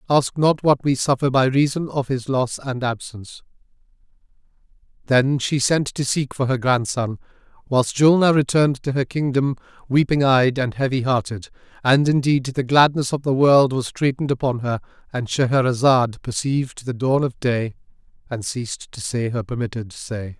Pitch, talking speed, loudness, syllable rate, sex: 130 Hz, 160 wpm, -20 LUFS, 4.9 syllables/s, male